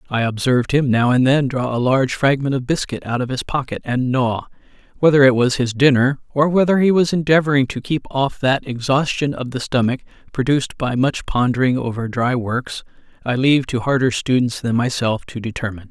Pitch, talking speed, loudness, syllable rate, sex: 130 Hz, 195 wpm, -18 LUFS, 5.5 syllables/s, male